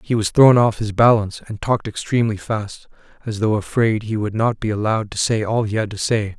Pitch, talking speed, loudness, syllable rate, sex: 110 Hz, 235 wpm, -19 LUFS, 5.8 syllables/s, male